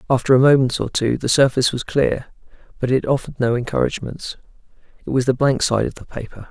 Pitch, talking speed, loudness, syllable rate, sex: 125 Hz, 205 wpm, -19 LUFS, 6.3 syllables/s, male